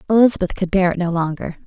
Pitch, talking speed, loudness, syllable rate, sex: 185 Hz, 215 wpm, -18 LUFS, 7.1 syllables/s, female